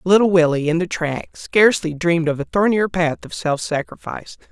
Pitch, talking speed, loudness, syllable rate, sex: 170 Hz, 185 wpm, -18 LUFS, 5.4 syllables/s, female